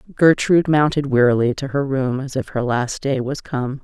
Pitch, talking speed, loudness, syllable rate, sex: 135 Hz, 205 wpm, -19 LUFS, 5.1 syllables/s, female